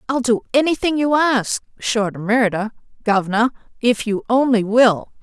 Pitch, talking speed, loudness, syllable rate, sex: 235 Hz, 150 wpm, -18 LUFS, 4.7 syllables/s, female